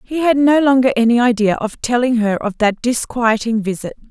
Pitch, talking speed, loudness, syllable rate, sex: 240 Hz, 190 wpm, -15 LUFS, 5.2 syllables/s, female